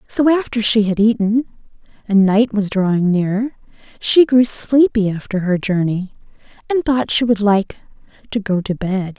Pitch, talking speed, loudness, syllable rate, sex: 215 Hz, 165 wpm, -16 LUFS, 4.4 syllables/s, female